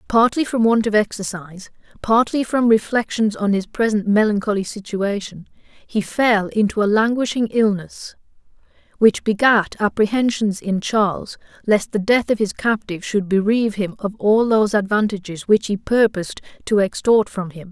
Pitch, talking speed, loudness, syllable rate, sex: 210 Hz, 150 wpm, -19 LUFS, 4.9 syllables/s, female